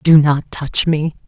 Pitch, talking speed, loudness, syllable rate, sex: 150 Hz, 190 wpm, -16 LUFS, 3.5 syllables/s, female